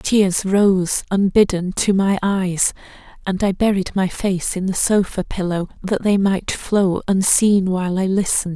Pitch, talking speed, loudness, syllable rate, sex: 190 Hz, 160 wpm, -18 LUFS, 4.1 syllables/s, female